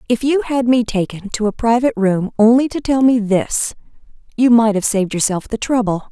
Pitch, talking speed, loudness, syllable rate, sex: 230 Hz, 205 wpm, -16 LUFS, 5.4 syllables/s, female